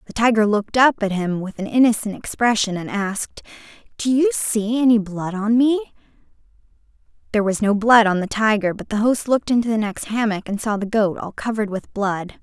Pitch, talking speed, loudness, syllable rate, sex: 215 Hz, 205 wpm, -19 LUFS, 5.6 syllables/s, female